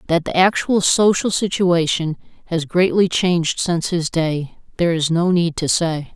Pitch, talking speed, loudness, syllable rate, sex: 170 Hz, 165 wpm, -18 LUFS, 4.6 syllables/s, female